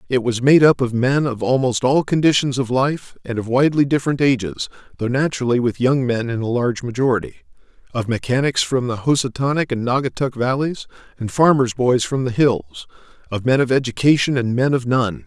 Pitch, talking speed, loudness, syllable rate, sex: 125 Hz, 190 wpm, -18 LUFS, 5.6 syllables/s, male